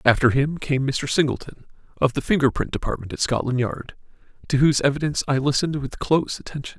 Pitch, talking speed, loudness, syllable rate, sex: 140 Hz, 185 wpm, -22 LUFS, 6.3 syllables/s, male